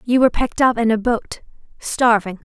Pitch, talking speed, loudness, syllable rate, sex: 230 Hz, 190 wpm, -18 LUFS, 5.5 syllables/s, female